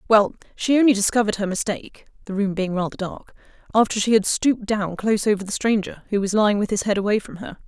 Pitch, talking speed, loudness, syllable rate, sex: 205 Hz, 225 wpm, -21 LUFS, 6.2 syllables/s, female